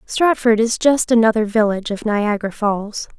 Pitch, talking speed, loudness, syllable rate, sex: 220 Hz, 150 wpm, -17 LUFS, 5.0 syllables/s, female